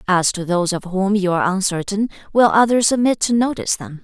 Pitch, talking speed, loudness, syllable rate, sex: 200 Hz, 210 wpm, -18 LUFS, 6.0 syllables/s, female